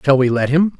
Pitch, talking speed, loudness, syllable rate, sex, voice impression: 145 Hz, 305 wpm, -15 LUFS, 6.0 syllables/s, male, very masculine, very adult-like, very middle-aged, thick, very tensed, very powerful, bright, hard, clear, slightly fluent, cool, intellectual, sincere, very calm, very mature, friendly, very reassuring, slightly unique, very wild, slightly sweet, slightly lively, kind